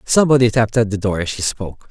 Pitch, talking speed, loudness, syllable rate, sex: 110 Hz, 250 wpm, -16 LUFS, 7.2 syllables/s, male